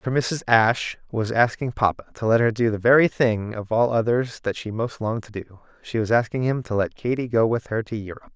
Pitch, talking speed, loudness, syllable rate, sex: 115 Hz, 245 wpm, -22 LUFS, 5.6 syllables/s, male